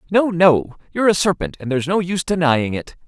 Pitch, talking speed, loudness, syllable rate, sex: 165 Hz, 215 wpm, -18 LUFS, 6.2 syllables/s, male